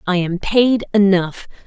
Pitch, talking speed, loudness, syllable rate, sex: 195 Hz, 145 wpm, -16 LUFS, 3.9 syllables/s, female